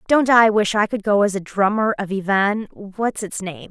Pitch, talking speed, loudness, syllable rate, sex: 205 Hz, 210 wpm, -19 LUFS, 4.6 syllables/s, female